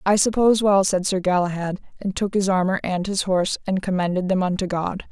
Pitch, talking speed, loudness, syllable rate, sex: 190 Hz, 210 wpm, -21 LUFS, 5.8 syllables/s, female